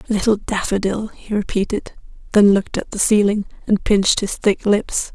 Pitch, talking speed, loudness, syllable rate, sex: 205 Hz, 165 wpm, -18 LUFS, 5.0 syllables/s, female